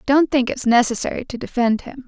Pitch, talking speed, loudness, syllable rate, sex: 255 Hz, 200 wpm, -19 LUFS, 5.6 syllables/s, female